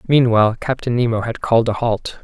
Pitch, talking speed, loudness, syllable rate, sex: 115 Hz, 190 wpm, -17 LUFS, 5.9 syllables/s, male